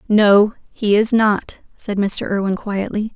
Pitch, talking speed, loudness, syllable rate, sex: 205 Hz, 150 wpm, -17 LUFS, 4.1 syllables/s, female